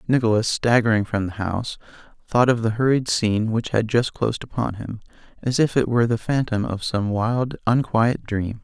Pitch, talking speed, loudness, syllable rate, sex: 115 Hz, 190 wpm, -21 LUFS, 5.2 syllables/s, male